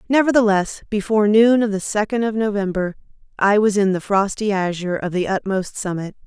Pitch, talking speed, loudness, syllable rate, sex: 205 Hz, 170 wpm, -19 LUFS, 5.7 syllables/s, female